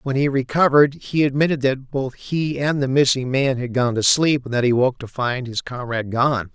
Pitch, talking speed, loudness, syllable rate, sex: 130 Hz, 230 wpm, -20 LUFS, 5.5 syllables/s, male